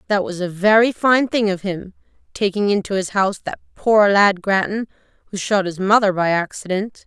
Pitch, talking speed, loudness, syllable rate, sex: 200 Hz, 180 wpm, -18 LUFS, 5.1 syllables/s, female